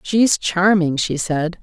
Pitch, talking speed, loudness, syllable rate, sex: 180 Hz, 150 wpm, -17 LUFS, 3.3 syllables/s, female